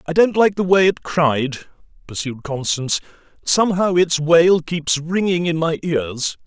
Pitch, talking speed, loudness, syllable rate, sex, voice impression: 165 Hz, 160 wpm, -18 LUFS, 4.4 syllables/s, male, masculine, adult-like, slightly powerful, fluent, slightly intellectual, slightly lively, slightly intense